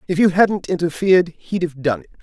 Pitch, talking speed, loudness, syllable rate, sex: 170 Hz, 215 wpm, -18 LUFS, 5.7 syllables/s, male